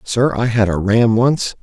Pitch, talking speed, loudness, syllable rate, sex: 115 Hz, 220 wpm, -15 LUFS, 4.8 syllables/s, male